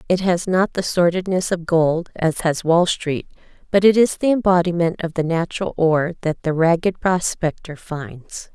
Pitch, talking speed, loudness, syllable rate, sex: 170 Hz, 175 wpm, -19 LUFS, 4.6 syllables/s, female